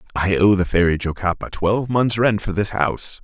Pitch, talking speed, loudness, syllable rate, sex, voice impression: 100 Hz, 205 wpm, -19 LUFS, 5.5 syllables/s, male, masculine, middle-aged, thick, tensed, powerful, hard, slightly muffled, intellectual, mature, wild, lively, strict, intense